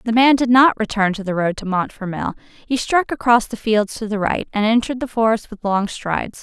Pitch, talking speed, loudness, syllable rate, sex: 225 Hz, 235 wpm, -18 LUFS, 5.5 syllables/s, female